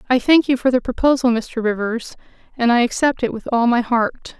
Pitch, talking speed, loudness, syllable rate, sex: 245 Hz, 220 wpm, -18 LUFS, 5.3 syllables/s, female